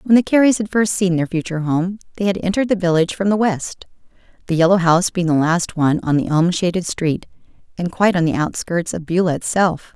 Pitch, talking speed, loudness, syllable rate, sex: 180 Hz, 225 wpm, -18 LUFS, 6.1 syllables/s, female